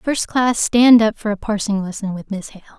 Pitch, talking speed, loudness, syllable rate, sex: 215 Hz, 235 wpm, -17 LUFS, 5.0 syllables/s, female